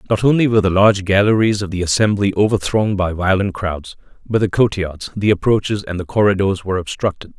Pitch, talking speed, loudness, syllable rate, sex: 100 Hz, 185 wpm, -17 LUFS, 6.2 syllables/s, male